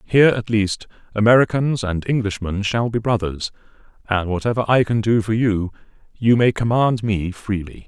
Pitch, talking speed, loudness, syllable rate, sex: 110 Hz, 160 wpm, -19 LUFS, 4.9 syllables/s, male